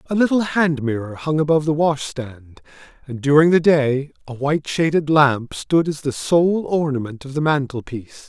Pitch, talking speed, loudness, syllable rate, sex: 145 Hz, 175 wpm, -19 LUFS, 4.9 syllables/s, male